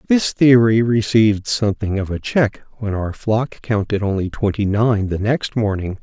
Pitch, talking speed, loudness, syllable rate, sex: 110 Hz, 170 wpm, -18 LUFS, 4.6 syllables/s, male